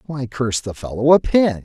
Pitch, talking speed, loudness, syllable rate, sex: 135 Hz, 220 wpm, -18 LUFS, 5.4 syllables/s, male